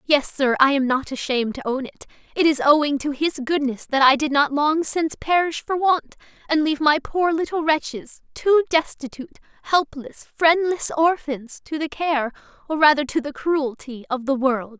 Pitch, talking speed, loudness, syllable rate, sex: 290 Hz, 185 wpm, -20 LUFS, 5.0 syllables/s, female